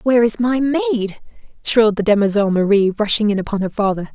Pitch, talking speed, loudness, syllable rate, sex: 210 Hz, 190 wpm, -17 LUFS, 7.0 syllables/s, female